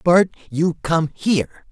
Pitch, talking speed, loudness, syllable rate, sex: 165 Hz, 140 wpm, -20 LUFS, 3.7 syllables/s, male